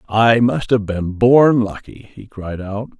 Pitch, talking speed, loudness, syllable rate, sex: 110 Hz, 180 wpm, -16 LUFS, 3.7 syllables/s, male